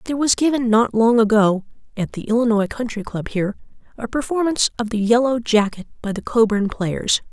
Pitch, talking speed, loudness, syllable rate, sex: 225 Hz, 180 wpm, -19 LUFS, 5.7 syllables/s, female